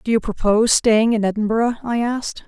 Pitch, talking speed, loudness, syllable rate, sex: 225 Hz, 195 wpm, -18 LUFS, 5.8 syllables/s, female